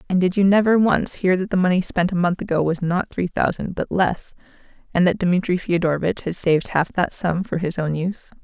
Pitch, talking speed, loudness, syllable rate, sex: 180 Hz, 230 wpm, -20 LUFS, 5.6 syllables/s, female